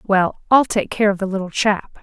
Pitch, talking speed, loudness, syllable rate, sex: 200 Hz, 240 wpm, -18 LUFS, 4.7 syllables/s, female